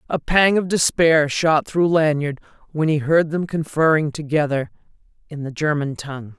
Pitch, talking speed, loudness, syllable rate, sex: 155 Hz, 160 wpm, -19 LUFS, 4.7 syllables/s, female